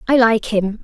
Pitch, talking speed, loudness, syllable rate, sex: 225 Hz, 215 wpm, -16 LUFS, 4.5 syllables/s, female